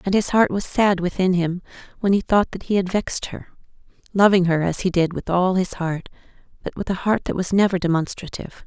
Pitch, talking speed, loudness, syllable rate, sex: 185 Hz, 215 wpm, -21 LUFS, 5.8 syllables/s, female